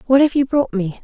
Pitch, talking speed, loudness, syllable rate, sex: 250 Hz, 290 wpm, -17 LUFS, 5.8 syllables/s, female